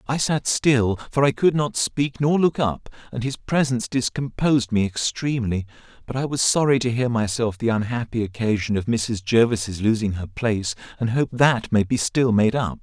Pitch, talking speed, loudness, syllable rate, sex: 120 Hz, 190 wpm, -22 LUFS, 5.0 syllables/s, male